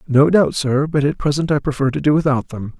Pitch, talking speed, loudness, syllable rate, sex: 145 Hz, 260 wpm, -17 LUFS, 5.8 syllables/s, male